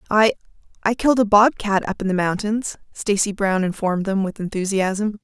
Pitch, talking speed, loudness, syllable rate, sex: 200 Hz, 160 wpm, -20 LUFS, 5.2 syllables/s, female